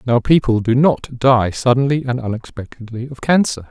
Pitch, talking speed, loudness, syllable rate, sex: 125 Hz, 160 wpm, -16 LUFS, 5.0 syllables/s, male